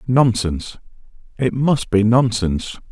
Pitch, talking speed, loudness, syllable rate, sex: 115 Hz, 105 wpm, -18 LUFS, 4.3 syllables/s, male